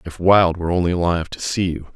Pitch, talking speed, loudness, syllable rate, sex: 85 Hz, 245 wpm, -19 LUFS, 7.1 syllables/s, male